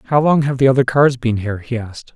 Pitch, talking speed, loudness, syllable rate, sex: 125 Hz, 280 wpm, -16 LUFS, 6.7 syllables/s, male